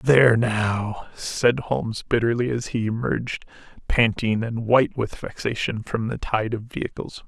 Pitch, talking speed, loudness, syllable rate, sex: 115 Hz, 150 wpm, -23 LUFS, 4.5 syllables/s, male